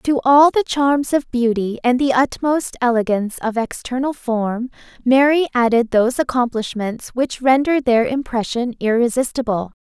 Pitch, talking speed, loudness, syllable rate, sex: 250 Hz, 135 wpm, -18 LUFS, 4.6 syllables/s, female